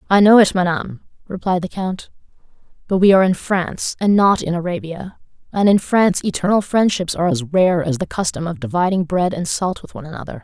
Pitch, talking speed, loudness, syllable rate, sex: 180 Hz, 200 wpm, -17 LUFS, 6.0 syllables/s, female